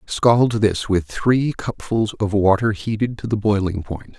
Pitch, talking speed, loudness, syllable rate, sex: 105 Hz, 170 wpm, -19 LUFS, 4.1 syllables/s, male